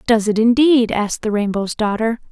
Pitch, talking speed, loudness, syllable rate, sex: 225 Hz, 180 wpm, -17 LUFS, 5.2 syllables/s, female